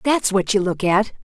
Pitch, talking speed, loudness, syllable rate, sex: 200 Hz, 240 wpm, -19 LUFS, 4.7 syllables/s, female